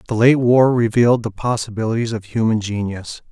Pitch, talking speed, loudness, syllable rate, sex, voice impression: 115 Hz, 165 wpm, -17 LUFS, 5.6 syllables/s, male, very masculine, very adult-like, middle-aged, very thick, slightly tensed, slightly powerful, slightly dark, soft, muffled, fluent, very cool, very intellectual, sincere, very calm, very mature, friendly, reassuring, slightly unique, slightly elegant, wild, sweet, slightly lively, very kind